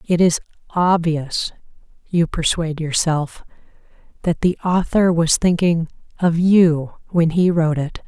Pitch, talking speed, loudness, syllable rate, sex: 165 Hz, 125 wpm, -18 LUFS, 4.2 syllables/s, female